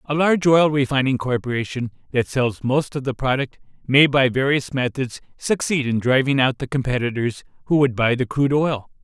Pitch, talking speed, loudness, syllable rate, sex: 130 Hz, 180 wpm, -20 LUFS, 5.3 syllables/s, male